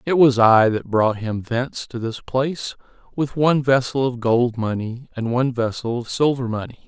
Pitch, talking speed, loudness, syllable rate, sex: 125 Hz, 190 wpm, -20 LUFS, 5.0 syllables/s, male